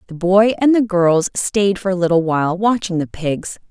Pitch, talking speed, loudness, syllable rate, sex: 185 Hz, 210 wpm, -16 LUFS, 4.8 syllables/s, female